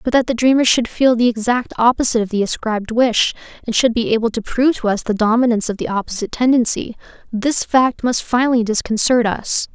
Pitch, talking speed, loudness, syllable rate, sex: 235 Hz, 195 wpm, -17 LUFS, 6.1 syllables/s, female